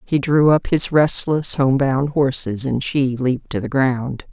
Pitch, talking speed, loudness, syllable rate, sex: 135 Hz, 195 wpm, -18 LUFS, 4.0 syllables/s, female